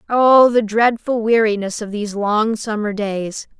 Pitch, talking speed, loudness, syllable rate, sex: 220 Hz, 150 wpm, -17 LUFS, 4.2 syllables/s, female